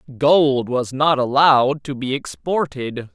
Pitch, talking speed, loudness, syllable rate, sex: 135 Hz, 135 wpm, -18 LUFS, 4.0 syllables/s, male